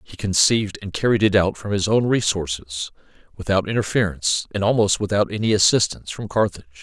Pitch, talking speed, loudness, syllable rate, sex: 100 Hz, 165 wpm, -20 LUFS, 6.2 syllables/s, male